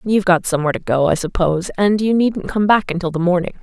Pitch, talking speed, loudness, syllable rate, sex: 185 Hz, 250 wpm, -17 LUFS, 6.7 syllables/s, female